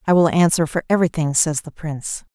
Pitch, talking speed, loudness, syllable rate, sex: 160 Hz, 205 wpm, -19 LUFS, 6.2 syllables/s, female